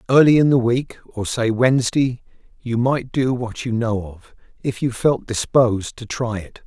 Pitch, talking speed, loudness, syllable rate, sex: 120 Hz, 190 wpm, -20 LUFS, 4.6 syllables/s, male